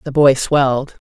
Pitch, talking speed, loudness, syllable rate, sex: 135 Hz, 170 wpm, -15 LUFS, 4.6 syllables/s, female